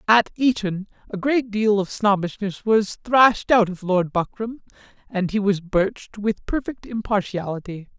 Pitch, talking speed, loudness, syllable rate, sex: 205 Hz, 150 wpm, -21 LUFS, 4.4 syllables/s, male